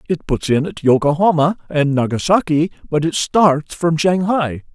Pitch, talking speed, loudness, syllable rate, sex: 160 Hz, 150 wpm, -16 LUFS, 4.5 syllables/s, male